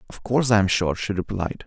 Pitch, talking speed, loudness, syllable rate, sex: 100 Hz, 215 wpm, -22 LUFS, 5.4 syllables/s, male